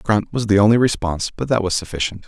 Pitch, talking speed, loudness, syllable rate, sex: 105 Hz, 265 wpm, -18 LUFS, 6.9 syllables/s, male